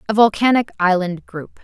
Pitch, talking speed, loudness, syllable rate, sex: 200 Hz, 145 wpm, -17 LUFS, 5.1 syllables/s, female